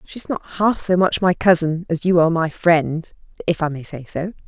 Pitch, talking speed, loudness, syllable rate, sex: 170 Hz, 215 wpm, -19 LUFS, 4.9 syllables/s, female